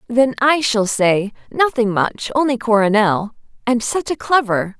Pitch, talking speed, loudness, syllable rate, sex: 235 Hz, 150 wpm, -17 LUFS, 4.3 syllables/s, female